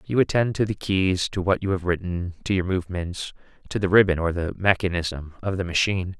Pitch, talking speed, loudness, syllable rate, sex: 90 Hz, 215 wpm, -24 LUFS, 5.6 syllables/s, male